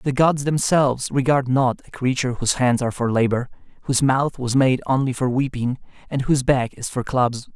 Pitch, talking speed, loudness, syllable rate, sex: 130 Hz, 200 wpm, -20 LUFS, 5.5 syllables/s, male